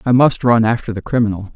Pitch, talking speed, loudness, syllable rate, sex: 115 Hz, 230 wpm, -16 LUFS, 6.3 syllables/s, male